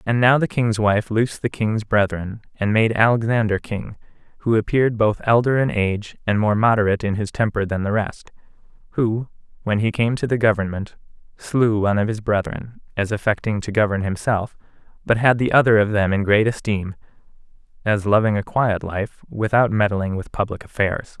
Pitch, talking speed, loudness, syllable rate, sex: 110 Hz, 180 wpm, -20 LUFS, 5.3 syllables/s, male